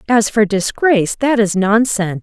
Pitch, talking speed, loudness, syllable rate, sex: 215 Hz, 135 wpm, -14 LUFS, 4.8 syllables/s, female